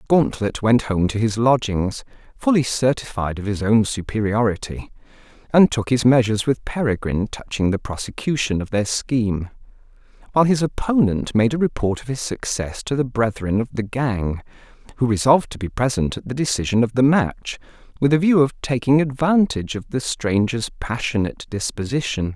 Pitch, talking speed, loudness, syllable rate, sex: 120 Hz, 165 wpm, -20 LUFS, 5.3 syllables/s, male